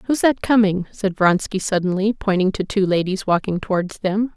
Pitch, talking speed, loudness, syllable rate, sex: 195 Hz, 180 wpm, -19 LUFS, 4.9 syllables/s, female